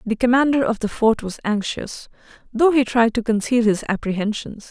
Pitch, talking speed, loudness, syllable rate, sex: 230 Hz, 180 wpm, -19 LUFS, 5.1 syllables/s, female